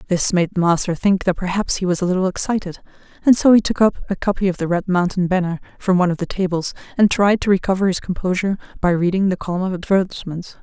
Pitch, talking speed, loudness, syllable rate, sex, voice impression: 185 Hz, 230 wpm, -19 LUFS, 6.7 syllables/s, female, feminine, adult-like, clear, fluent, slightly raspy, intellectual, elegant, strict, sharp